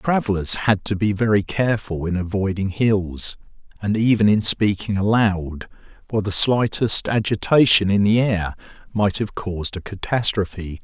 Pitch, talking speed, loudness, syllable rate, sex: 100 Hz, 150 wpm, -19 LUFS, 4.7 syllables/s, male